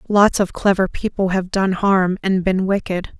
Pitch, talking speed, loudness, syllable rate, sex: 190 Hz, 190 wpm, -18 LUFS, 4.3 syllables/s, female